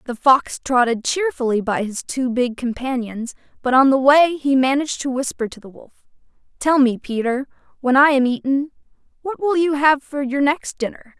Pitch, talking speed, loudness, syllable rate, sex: 265 Hz, 190 wpm, -19 LUFS, 5.2 syllables/s, female